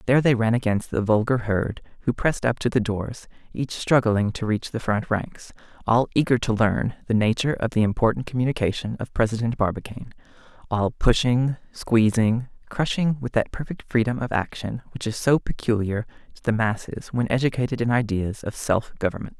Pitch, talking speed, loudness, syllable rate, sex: 115 Hz, 175 wpm, -23 LUFS, 5.4 syllables/s, male